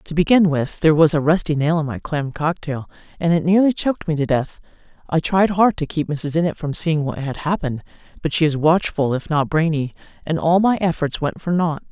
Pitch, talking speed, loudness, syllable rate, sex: 160 Hz, 225 wpm, -19 LUFS, 5.5 syllables/s, female